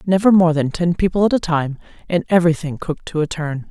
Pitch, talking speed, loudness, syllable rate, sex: 165 Hz, 225 wpm, -18 LUFS, 6.2 syllables/s, female